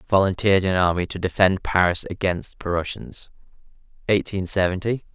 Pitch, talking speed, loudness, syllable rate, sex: 95 Hz, 115 wpm, -22 LUFS, 5.1 syllables/s, male